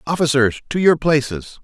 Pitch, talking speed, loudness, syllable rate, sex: 140 Hz, 145 wpm, -17 LUFS, 5.0 syllables/s, male